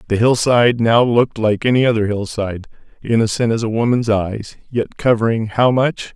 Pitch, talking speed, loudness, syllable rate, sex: 115 Hz, 165 wpm, -16 LUFS, 5.3 syllables/s, male